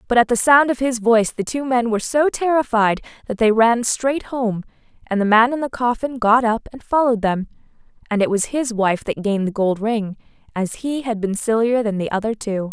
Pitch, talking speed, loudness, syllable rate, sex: 230 Hz, 225 wpm, -19 LUFS, 5.4 syllables/s, female